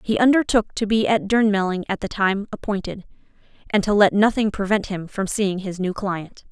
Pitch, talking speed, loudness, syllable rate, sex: 200 Hz, 195 wpm, -21 LUFS, 5.3 syllables/s, female